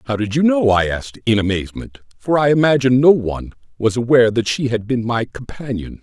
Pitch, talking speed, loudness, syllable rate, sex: 120 Hz, 210 wpm, -17 LUFS, 6.2 syllables/s, male